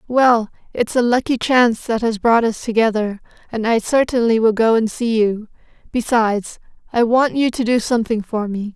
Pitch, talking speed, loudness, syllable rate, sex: 230 Hz, 185 wpm, -17 LUFS, 5.1 syllables/s, female